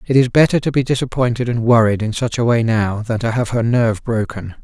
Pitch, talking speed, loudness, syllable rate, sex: 115 Hz, 245 wpm, -17 LUFS, 5.8 syllables/s, male